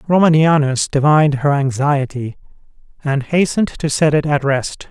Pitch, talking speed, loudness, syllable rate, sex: 145 Hz, 135 wpm, -15 LUFS, 4.9 syllables/s, male